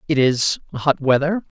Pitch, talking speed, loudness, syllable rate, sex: 145 Hz, 150 wpm, -19 LUFS, 4.9 syllables/s, male